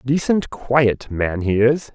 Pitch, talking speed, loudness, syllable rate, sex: 125 Hz, 155 wpm, -19 LUFS, 3.2 syllables/s, male